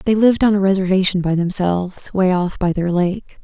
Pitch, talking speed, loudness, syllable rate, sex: 185 Hz, 210 wpm, -17 LUFS, 5.9 syllables/s, female